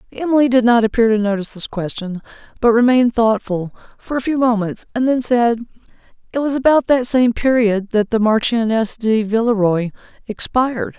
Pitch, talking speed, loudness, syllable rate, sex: 230 Hz, 165 wpm, -16 LUFS, 5.4 syllables/s, female